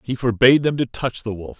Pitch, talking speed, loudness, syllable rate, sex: 120 Hz, 265 wpm, -19 LUFS, 6.0 syllables/s, male